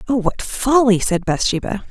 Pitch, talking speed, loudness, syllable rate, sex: 220 Hz, 155 wpm, -17 LUFS, 4.7 syllables/s, female